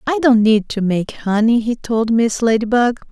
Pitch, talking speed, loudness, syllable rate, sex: 230 Hz, 195 wpm, -16 LUFS, 4.6 syllables/s, female